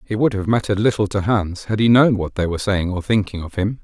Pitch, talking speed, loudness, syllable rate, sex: 105 Hz, 280 wpm, -19 LUFS, 6.2 syllables/s, male